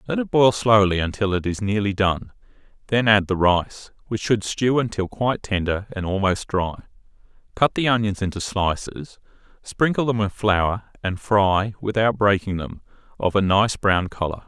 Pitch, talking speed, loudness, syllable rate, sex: 100 Hz, 170 wpm, -21 LUFS, 4.7 syllables/s, male